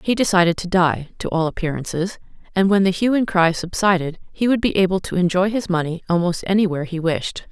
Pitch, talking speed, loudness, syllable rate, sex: 180 Hz, 210 wpm, -19 LUFS, 5.9 syllables/s, female